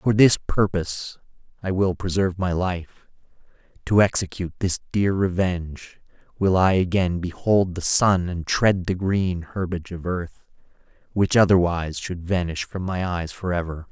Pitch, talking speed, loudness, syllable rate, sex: 90 Hz, 145 wpm, -22 LUFS, 4.6 syllables/s, male